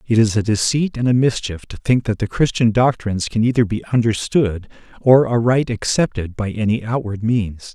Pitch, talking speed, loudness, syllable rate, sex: 115 Hz, 185 wpm, -18 LUFS, 5.1 syllables/s, male